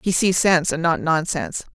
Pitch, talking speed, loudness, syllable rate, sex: 170 Hz, 205 wpm, -20 LUFS, 5.7 syllables/s, female